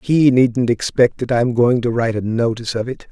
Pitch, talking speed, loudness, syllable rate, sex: 120 Hz, 230 wpm, -17 LUFS, 5.3 syllables/s, male